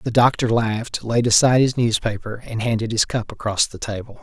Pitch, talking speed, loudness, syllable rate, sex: 115 Hz, 200 wpm, -20 LUFS, 5.6 syllables/s, male